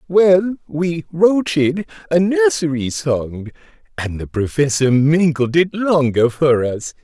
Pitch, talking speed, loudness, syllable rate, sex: 150 Hz, 120 wpm, -17 LUFS, 3.6 syllables/s, male